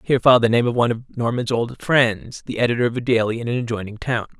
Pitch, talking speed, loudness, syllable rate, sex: 120 Hz, 260 wpm, -20 LUFS, 7.1 syllables/s, male